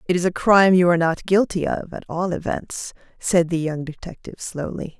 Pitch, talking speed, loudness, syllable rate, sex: 175 Hz, 205 wpm, -20 LUFS, 5.5 syllables/s, female